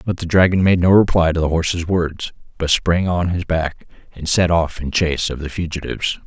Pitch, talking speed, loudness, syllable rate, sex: 85 Hz, 220 wpm, -18 LUFS, 5.3 syllables/s, male